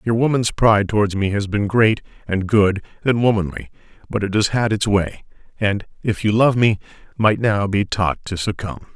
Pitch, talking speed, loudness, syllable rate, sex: 105 Hz, 195 wpm, -19 LUFS, 5.0 syllables/s, male